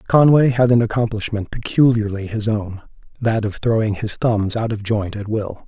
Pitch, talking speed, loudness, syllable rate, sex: 110 Hz, 170 wpm, -19 LUFS, 4.9 syllables/s, male